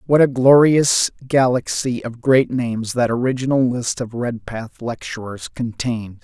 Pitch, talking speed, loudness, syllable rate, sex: 125 Hz, 135 wpm, -18 LUFS, 4.4 syllables/s, male